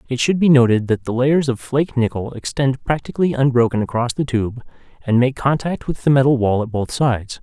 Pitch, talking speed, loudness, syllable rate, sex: 130 Hz, 210 wpm, -18 LUFS, 5.7 syllables/s, male